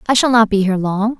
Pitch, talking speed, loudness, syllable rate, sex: 215 Hz, 300 wpm, -15 LUFS, 6.8 syllables/s, female